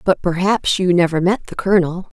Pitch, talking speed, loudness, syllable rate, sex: 180 Hz, 190 wpm, -17 LUFS, 5.4 syllables/s, female